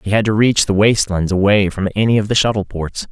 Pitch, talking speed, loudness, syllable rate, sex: 100 Hz, 250 wpm, -15 LUFS, 6.0 syllables/s, male